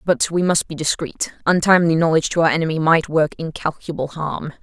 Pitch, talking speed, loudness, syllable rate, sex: 160 Hz, 180 wpm, -19 LUFS, 6.0 syllables/s, female